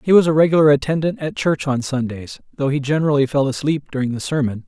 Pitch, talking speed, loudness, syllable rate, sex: 145 Hz, 220 wpm, -18 LUFS, 6.4 syllables/s, male